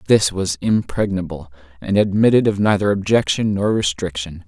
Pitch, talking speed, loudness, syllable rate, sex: 95 Hz, 135 wpm, -18 LUFS, 5.0 syllables/s, male